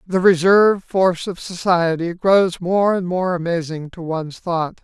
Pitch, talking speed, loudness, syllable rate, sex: 175 Hz, 160 wpm, -18 LUFS, 4.5 syllables/s, male